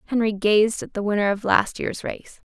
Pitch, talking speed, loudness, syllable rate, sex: 210 Hz, 215 wpm, -22 LUFS, 5.0 syllables/s, female